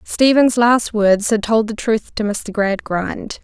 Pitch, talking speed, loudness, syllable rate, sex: 220 Hz, 175 wpm, -16 LUFS, 3.6 syllables/s, female